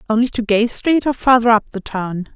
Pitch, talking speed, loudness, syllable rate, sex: 225 Hz, 230 wpm, -16 LUFS, 5.2 syllables/s, female